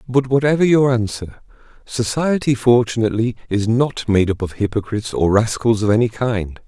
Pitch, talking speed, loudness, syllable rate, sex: 115 Hz, 155 wpm, -18 LUFS, 5.2 syllables/s, male